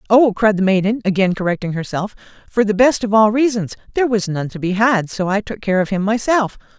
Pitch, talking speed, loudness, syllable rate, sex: 210 Hz, 230 wpm, -17 LUFS, 5.8 syllables/s, female